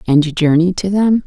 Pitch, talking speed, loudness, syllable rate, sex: 175 Hz, 235 wpm, -14 LUFS, 5.3 syllables/s, female